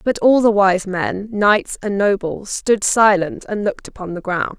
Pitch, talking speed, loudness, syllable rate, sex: 200 Hz, 195 wpm, -17 LUFS, 4.3 syllables/s, female